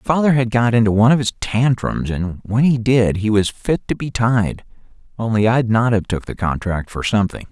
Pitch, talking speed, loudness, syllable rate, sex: 115 Hz, 215 wpm, -18 LUFS, 5.1 syllables/s, male